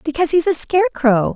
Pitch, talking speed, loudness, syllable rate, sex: 300 Hz, 175 wpm, -16 LUFS, 6.4 syllables/s, female